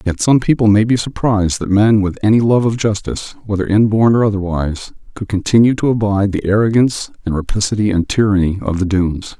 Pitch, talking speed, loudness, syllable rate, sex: 105 Hz, 190 wpm, -15 LUFS, 6.2 syllables/s, male